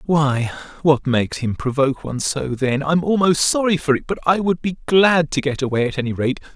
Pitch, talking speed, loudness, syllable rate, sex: 150 Hz, 210 wpm, -19 LUFS, 5.5 syllables/s, male